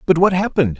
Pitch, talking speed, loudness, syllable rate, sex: 165 Hz, 225 wpm, -16 LUFS, 7.7 syllables/s, male